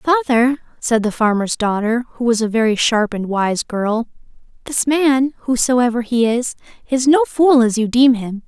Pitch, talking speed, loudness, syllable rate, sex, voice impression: 240 Hz, 175 wpm, -16 LUFS, 4.4 syllables/s, female, slightly gender-neutral, young, slightly fluent, friendly